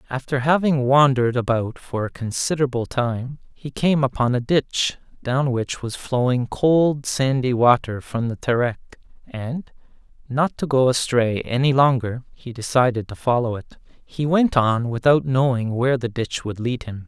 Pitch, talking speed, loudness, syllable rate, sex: 125 Hz, 160 wpm, -21 LUFS, 4.5 syllables/s, male